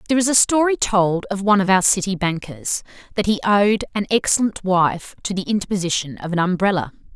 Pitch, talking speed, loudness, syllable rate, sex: 195 Hz, 195 wpm, -19 LUFS, 5.9 syllables/s, female